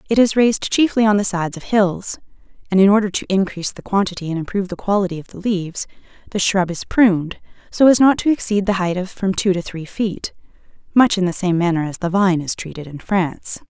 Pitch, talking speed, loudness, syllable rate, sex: 190 Hz, 230 wpm, -18 LUFS, 6.1 syllables/s, female